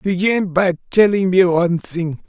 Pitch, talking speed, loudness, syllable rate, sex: 180 Hz, 160 wpm, -16 LUFS, 4.4 syllables/s, male